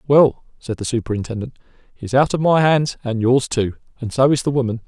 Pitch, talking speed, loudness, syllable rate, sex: 125 Hz, 220 wpm, -18 LUFS, 5.8 syllables/s, male